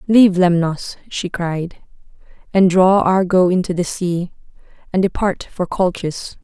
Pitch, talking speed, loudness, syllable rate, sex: 180 Hz, 130 wpm, -17 LUFS, 4.1 syllables/s, female